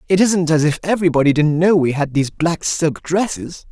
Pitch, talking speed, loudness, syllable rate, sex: 165 Hz, 210 wpm, -16 LUFS, 5.5 syllables/s, male